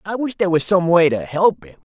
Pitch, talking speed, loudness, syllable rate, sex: 175 Hz, 280 wpm, -17 LUFS, 6.0 syllables/s, male